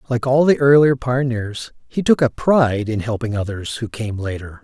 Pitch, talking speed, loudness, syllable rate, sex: 125 Hz, 195 wpm, -18 LUFS, 4.9 syllables/s, male